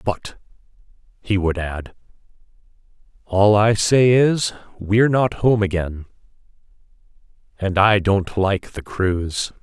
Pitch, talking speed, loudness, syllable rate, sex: 100 Hz, 110 wpm, -19 LUFS, 3.8 syllables/s, male